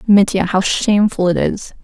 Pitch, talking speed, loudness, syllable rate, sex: 195 Hz, 165 wpm, -15 LUFS, 4.9 syllables/s, female